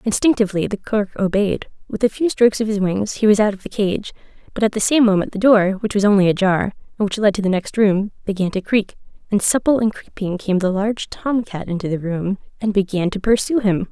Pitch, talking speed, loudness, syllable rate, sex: 205 Hz, 235 wpm, -18 LUFS, 5.8 syllables/s, female